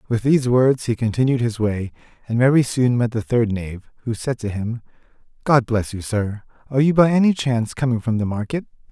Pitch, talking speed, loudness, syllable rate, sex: 120 Hz, 210 wpm, -20 LUFS, 5.7 syllables/s, male